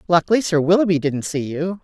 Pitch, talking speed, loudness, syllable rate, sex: 170 Hz, 195 wpm, -19 LUFS, 6.0 syllables/s, female